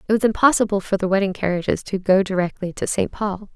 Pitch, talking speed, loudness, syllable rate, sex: 195 Hz, 220 wpm, -20 LUFS, 6.3 syllables/s, female